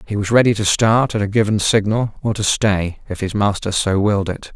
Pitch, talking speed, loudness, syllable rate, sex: 105 Hz, 235 wpm, -17 LUFS, 5.4 syllables/s, male